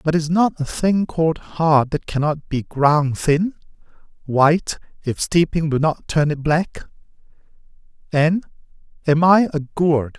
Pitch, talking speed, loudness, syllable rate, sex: 155 Hz, 145 wpm, -19 LUFS, 4.0 syllables/s, male